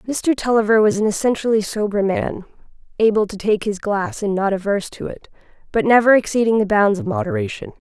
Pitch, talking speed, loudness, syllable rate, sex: 215 Hz, 175 wpm, -18 LUFS, 5.8 syllables/s, female